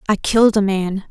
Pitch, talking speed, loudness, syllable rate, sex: 200 Hz, 220 wpm, -16 LUFS, 5.6 syllables/s, female